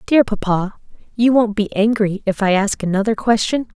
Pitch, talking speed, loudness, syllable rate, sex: 210 Hz, 175 wpm, -17 LUFS, 5.0 syllables/s, female